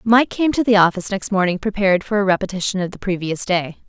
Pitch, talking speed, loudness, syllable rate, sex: 195 Hz, 230 wpm, -18 LUFS, 6.5 syllables/s, female